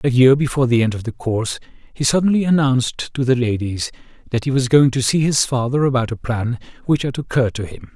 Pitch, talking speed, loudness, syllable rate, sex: 130 Hz, 225 wpm, -18 LUFS, 6.2 syllables/s, male